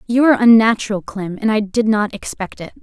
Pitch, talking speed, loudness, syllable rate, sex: 215 Hz, 215 wpm, -16 LUFS, 5.8 syllables/s, female